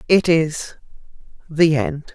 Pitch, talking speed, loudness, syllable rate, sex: 155 Hz, 110 wpm, -18 LUFS, 3.2 syllables/s, female